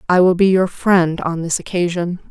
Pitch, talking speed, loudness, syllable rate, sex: 180 Hz, 210 wpm, -16 LUFS, 4.9 syllables/s, female